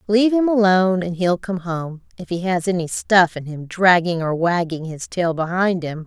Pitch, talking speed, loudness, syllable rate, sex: 180 Hz, 210 wpm, -19 LUFS, 4.9 syllables/s, female